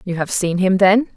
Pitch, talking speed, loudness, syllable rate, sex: 190 Hz, 260 wpm, -16 LUFS, 4.9 syllables/s, female